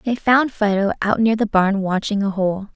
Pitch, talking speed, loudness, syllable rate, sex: 210 Hz, 220 wpm, -18 LUFS, 4.8 syllables/s, female